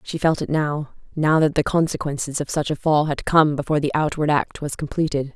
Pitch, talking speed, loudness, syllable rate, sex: 150 Hz, 215 wpm, -21 LUFS, 5.6 syllables/s, female